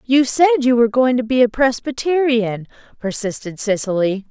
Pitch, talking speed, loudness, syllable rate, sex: 240 Hz, 155 wpm, -17 LUFS, 4.9 syllables/s, female